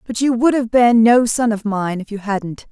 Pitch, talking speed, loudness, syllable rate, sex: 225 Hz, 265 wpm, -16 LUFS, 4.6 syllables/s, female